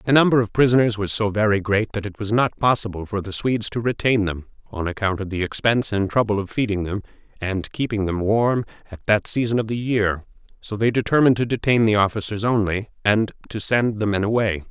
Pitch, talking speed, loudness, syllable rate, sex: 105 Hz, 215 wpm, -21 LUFS, 5.9 syllables/s, male